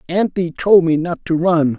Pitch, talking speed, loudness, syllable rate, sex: 170 Hz, 200 wpm, -16 LUFS, 4.6 syllables/s, male